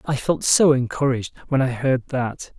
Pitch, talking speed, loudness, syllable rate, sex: 130 Hz, 185 wpm, -20 LUFS, 4.7 syllables/s, male